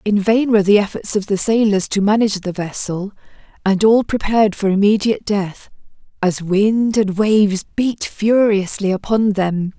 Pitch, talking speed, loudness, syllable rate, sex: 205 Hz, 160 wpm, -16 LUFS, 4.8 syllables/s, female